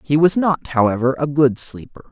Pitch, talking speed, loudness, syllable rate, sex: 140 Hz, 200 wpm, -17 LUFS, 5.1 syllables/s, male